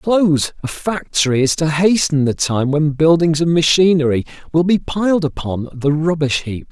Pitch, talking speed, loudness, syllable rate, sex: 155 Hz, 180 wpm, -16 LUFS, 4.9 syllables/s, male